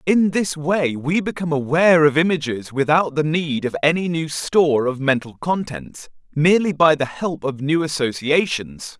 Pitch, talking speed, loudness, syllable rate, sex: 155 Hz, 165 wpm, -19 LUFS, 4.8 syllables/s, male